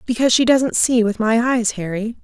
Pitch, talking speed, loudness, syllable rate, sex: 230 Hz, 215 wpm, -17 LUFS, 5.3 syllables/s, female